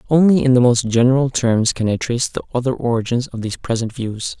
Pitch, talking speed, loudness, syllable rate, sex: 120 Hz, 220 wpm, -17 LUFS, 6.2 syllables/s, male